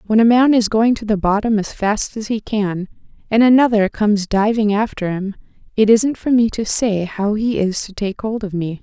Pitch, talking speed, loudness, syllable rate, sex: 215 Hz, 215 wpm, -17 LUFS, 5.0 syllables/s, female